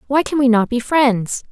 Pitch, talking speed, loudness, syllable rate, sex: 255 Hz, 240 wpm, -16 LUFS, 4.7 syllables/s, female